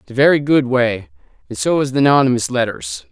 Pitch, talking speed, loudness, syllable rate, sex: 135 Hz, 210 wpm, -16 LUFS, 5.6 syllables/s, male